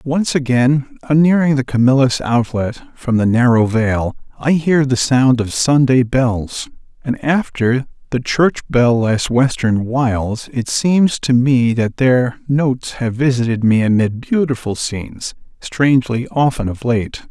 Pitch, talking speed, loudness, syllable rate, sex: 130 Hz, 150 wpm, -15 LUFS, 4.0 syllables/s, male